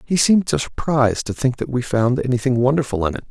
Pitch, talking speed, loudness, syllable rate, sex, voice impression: 130 Hz, 220 wpm, -19 LUFS, 6.1 syllables/s, male, masculine, adult-like, thick, tensed, slightly powerful, hard, clear, fluent, cool, mature, friendly, wild, lively, slightly strict